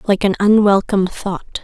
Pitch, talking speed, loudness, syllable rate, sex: 200 Hz, 145 wpm, -15 LUFS, 4.8 syllables/s, female